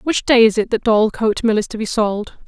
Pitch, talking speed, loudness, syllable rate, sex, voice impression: 220 Hz, 265 wpm, -16 LUFS, 5.6 syllables/s, female, feminine, adult-like, fluent, intellectual, slightly friendly